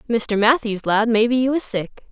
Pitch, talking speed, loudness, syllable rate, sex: 230 Hz, 200 wpm, -19 LUFS, 5.4 syllables/s, female